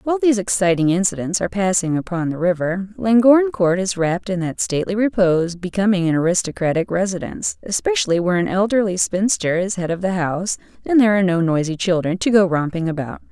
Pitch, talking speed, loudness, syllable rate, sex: 190 Hz, 180 wpm, -19 LUFS, 6.4 syllables/s, female